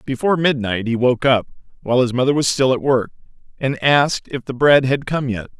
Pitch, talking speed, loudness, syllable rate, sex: 130 Hz, 215 wpm, -17 LUFS, 5.7 syllables/s, male